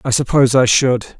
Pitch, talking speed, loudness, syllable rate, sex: 125 Hz, 200 wpm, -14 LUFS, 5.5 syllables/s, male